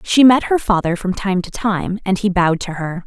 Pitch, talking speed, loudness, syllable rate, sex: 195 Hz, 255 wpm, -17 LUFS, 5.2 syllables/s, female